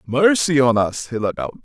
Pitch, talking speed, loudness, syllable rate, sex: 130 Hz, 220 wpm, -18 LUFS, 4.8 syllables/s, male